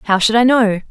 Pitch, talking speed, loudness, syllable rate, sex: 220 Hz, 265 wpm, -13 LUFS, 4.9 syllables/s, female